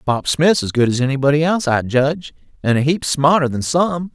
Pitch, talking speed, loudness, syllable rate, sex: 145 Hz, 215 wpm, -17 LUFS, 5.6 syllables/s, male